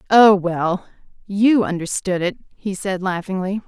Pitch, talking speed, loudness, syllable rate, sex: 190 Hz, 130 wpm, -19 LUFS, 4.2 syllables/s, female